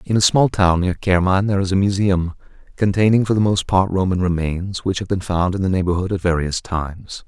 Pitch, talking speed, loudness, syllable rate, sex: 95 Hz, 225 wpm, -18 LUFS, 5.6 syllables/s, male